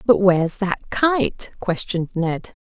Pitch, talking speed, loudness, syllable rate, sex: 195 Hz, 135 wpm, -20 LUFS, 4.0 syllables/s, female